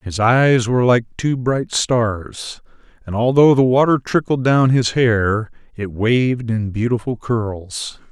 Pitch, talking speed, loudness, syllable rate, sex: 120 Hz, 150 wpm, -17 LUFS, 3.7 syllables/s, male